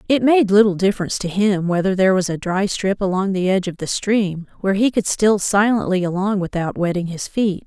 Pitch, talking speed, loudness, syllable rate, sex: 195 Hz, 220 wpm, -18 LUFS, 5.7 syllables/s, female